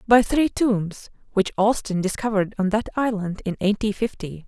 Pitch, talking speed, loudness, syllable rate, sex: 210 Hz, 160 wpm, -23 LUFS, 5.0 syllables/s, female